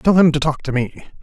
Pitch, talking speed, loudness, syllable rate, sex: 145 Hz, 295 wpm, -18 LUFS, 6.5 syllables/s, male